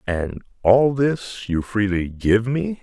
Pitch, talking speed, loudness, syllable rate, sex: 115 Hz, 150 wpm, -20 LUFS, 3.3 syllables/s, male